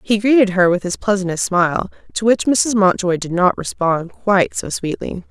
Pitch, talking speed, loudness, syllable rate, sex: 195 Hz, 190 wpm, -17 LUFS, 5.0 syllables/s, female